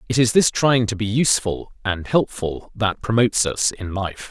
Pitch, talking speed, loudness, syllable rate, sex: 110 Hz, 195 wpm, -20 LUFS, 4.9 syllables/s, male